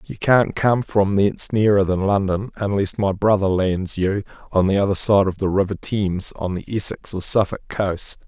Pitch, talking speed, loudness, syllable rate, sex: 100 Hz, 195 wpm, -20 LUFS, 4.9 syllables/s, male